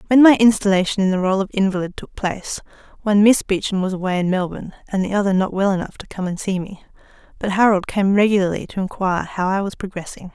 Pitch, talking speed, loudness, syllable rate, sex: 195 Hz, 220 wpm, -19 LUFS, 6.6 syllables/s, female